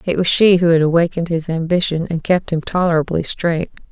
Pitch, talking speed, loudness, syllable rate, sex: 170 Hz, 200 wpm, -16 LUFS, 5.8 syllables/s, female